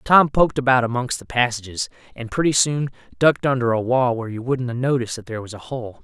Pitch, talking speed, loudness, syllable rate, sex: 125 Hz, 230 wpm, -21 LUFS, 6.5 syllables/s, male